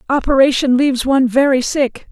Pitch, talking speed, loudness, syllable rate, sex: 265 Hz, 140 wpm, -14 LUFS, 5.8 syllables/s, female